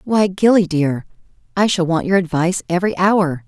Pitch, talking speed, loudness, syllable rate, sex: 180 Hz, 175 wpm, -17 LUFS, 5.3 syllables/s, female